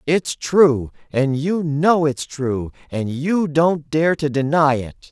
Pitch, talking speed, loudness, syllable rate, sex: 150 Hz, 165 wpm, -19 LUFS, 3.3 syllables/s, male